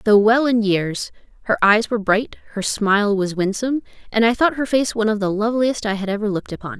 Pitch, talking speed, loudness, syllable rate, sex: 215 Hz, 230 wpm, -19 LUFS, 6.2 syllables/s, female